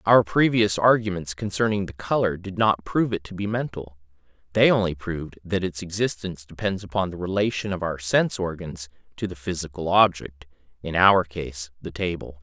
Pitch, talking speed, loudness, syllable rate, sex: 90 Hz, 170 wpm, -24 LUFS, 5.4 syllables/s, male